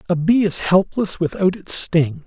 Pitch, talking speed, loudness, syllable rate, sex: 175 Hz, 185 wpm, -18 LUFS, 4.4 syllables/s, male